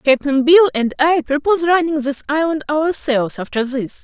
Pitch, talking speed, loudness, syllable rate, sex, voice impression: 290 Hz, 165 wpm, -16 LUFS, 4.9 syllables/s, female, feminine, adult-like, powerful, slightly muffled, halting, slightly friendly, unique, slightly lively, slightly sharp